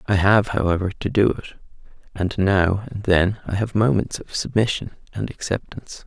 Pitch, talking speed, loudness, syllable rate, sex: 100 Hz, 170 wpm, -21 LUFS, 5.0 syllables/s, male